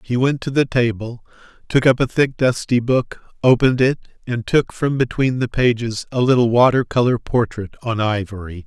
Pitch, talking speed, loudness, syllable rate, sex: 120 Hz, 180 wpm, -18 LUFS, 5.0 syllables/s, male